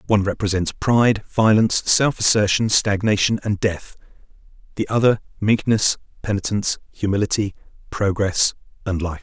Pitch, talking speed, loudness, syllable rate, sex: 105 Hz, 110 wpm, -19 LUFS, 5.2 syllables/s, male